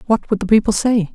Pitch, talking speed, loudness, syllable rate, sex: 215 Hz, 260 wpm, -16 LUFS, 6.1 syllables/s, female